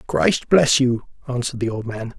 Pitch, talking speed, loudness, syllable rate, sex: 130 Hz, 190 wpm, -20 LUFS, 4.8 syllables/s, male